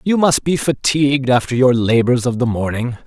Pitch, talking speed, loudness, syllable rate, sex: 130 Hz, 195 wpm, -16 LUFS, 5.2 syllables/s, male